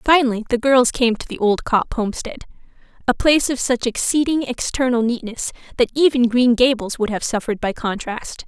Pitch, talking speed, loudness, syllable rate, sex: 240 Hz, 175 wpm, -19 LUFS, 5.5 syllables/s, female